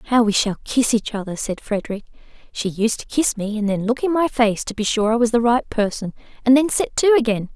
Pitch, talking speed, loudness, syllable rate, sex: 230 Hz, 255 wpm, -19 LUFS, 5.8 syllables/s, female